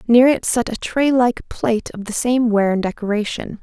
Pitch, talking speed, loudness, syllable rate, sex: 225 Hz, 215 wpm, -18 LUFS, 4.9 syllables/s, female